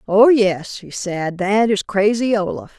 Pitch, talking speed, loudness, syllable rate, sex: 205 Hz, 170 wpm, -17 LUFS, 3.9 syllables/s, female